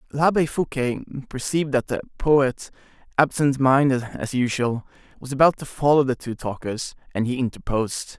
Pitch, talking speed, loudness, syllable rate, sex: 135 Hz, 145 wpm, -22 LUFS, 5.1 syllables/s, male